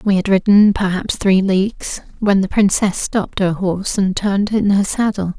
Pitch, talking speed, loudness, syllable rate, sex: 195 Hz, 190 wpm, -16 LUFS, 4.9 syllables/s, female